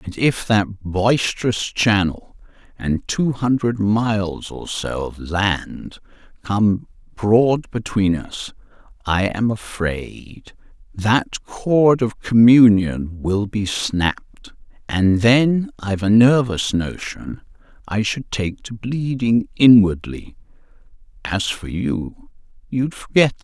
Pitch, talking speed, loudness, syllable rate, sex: 105 Hz, 115 wpm, -19 LUFS, 3.2 syllables/s, male